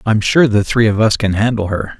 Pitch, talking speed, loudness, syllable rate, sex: 110 Hz, 270 wpm, -14 LUFS, 5.5 syllables/s, male